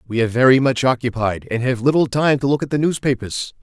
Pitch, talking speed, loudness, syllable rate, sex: 125 Hz, 230 wpm, -18 LUFS, 6.2 syllables/s, male